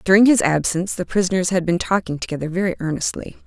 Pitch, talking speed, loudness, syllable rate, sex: 185 Hz, 190 wpm, -19 LUFS, 6.8 syllables/s, female